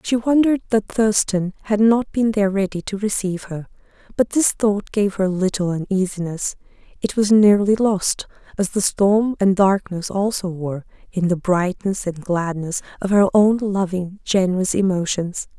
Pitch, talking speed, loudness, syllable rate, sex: 195 Hz, 160 wpm, -19 LUFS, 4.7 syllables/s, female